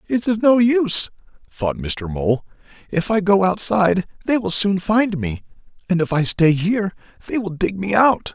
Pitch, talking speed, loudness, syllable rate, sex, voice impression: 180 Hz, 185 wpm, -19 LUFS, 4.7 syllables/s, male, very masculine, very adult-like, very middle-aged, very thick, tensed, powerful, slightly dark, hard, slightly muffled, fluent, slightly raspy, very cool, intellectual, very sincere, calm, mature, friendly, reassuring, unique, elegant, slightly wild, sweet, lively, kind